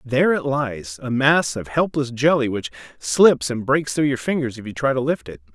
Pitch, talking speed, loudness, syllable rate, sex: 130 Hz, 225 wpm, -20 LUFS, 5.0 syllables/s, male